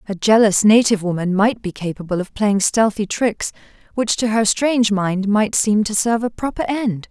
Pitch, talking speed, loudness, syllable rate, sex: 210 Hz, 195 wpm, -17 LUFS, 5.1 syllables/s, female